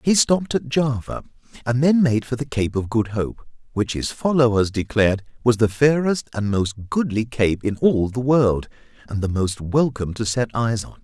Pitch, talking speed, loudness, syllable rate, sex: 120 Hz, 190 wpm, -21 LUFS, 4.9 syllables/s, male